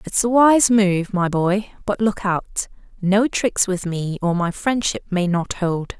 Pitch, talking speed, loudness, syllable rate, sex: 195 Hz, 190 wpm, -19 LUFS, 3.9 syllables/s, female